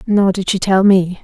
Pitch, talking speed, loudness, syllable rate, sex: 190 Hz, 245 wpm, -14 LUFS, 4.6 syllables/s, female